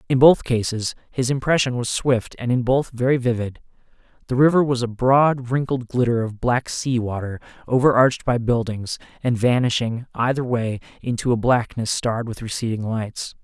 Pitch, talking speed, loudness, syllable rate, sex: 120 Hz, 165 wpm, -21 LUFS, 5.0 syllables/s, male